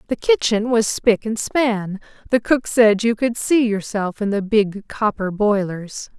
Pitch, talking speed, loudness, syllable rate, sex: 215 Hz, 175 wpm, -19 LUFS, 3.9 syllables/s, female